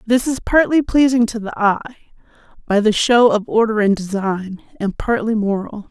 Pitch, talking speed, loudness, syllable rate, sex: 220 Hz, 175 wpm, -17 LUFS, 4.9 syllables/s, female